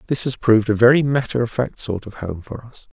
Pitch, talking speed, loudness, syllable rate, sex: 115 Hz, 260 wpm, -19 LUFS, 5.9 syllables/s, male